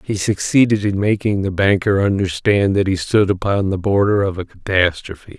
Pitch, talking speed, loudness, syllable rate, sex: 100 Hz, 180 wpm, -17 LUFS, 5.1 syllables/s, male